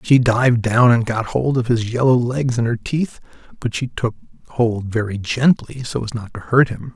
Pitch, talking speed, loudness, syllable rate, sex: 120 Hz, 215 wpm, -18 LUFS, 4.8 syllables/s, male